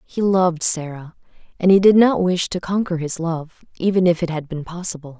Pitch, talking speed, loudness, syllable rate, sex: 175 Hz, 195 wpm, -19 LUFS, 5.3 syllables/s, female